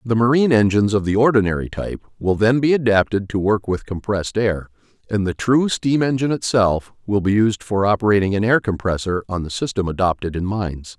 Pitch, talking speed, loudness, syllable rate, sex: 105 Hz, 195 wpm, -19 LUFS, 5.9 syllables/s, male